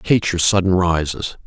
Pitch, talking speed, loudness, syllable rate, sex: 90 Hz, 205 wpm, -17 LUFS, 5.3 syllables/s, male